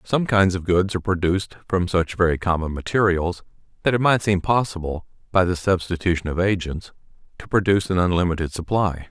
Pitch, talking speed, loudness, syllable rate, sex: 90 Hz, 170 wpm, -21 LUFS, 5.8 syllables/s, male